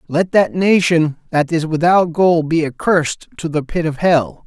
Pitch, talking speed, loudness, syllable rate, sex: 165 Hz, 190 wpm, -16 LUFS, 4.4 syllables/s, male